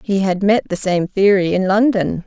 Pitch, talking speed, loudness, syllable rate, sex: 195 Hz, 210 wpm, -16 LUFS, 4.7 syllables/s, female